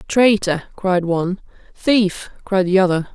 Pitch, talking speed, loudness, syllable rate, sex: 190 Hz, 135 wpm, -18 LUFS, 4.1 syllables/s, female